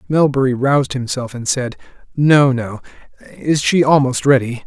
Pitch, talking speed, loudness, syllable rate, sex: 130 Hz, 140 wpm, -15 LUFS, 4.8 syllables/s, male